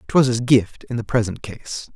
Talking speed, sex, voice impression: 215 wpm, male, masculine, adult-like, fluent, slightly refreshing, sincere, slightly kind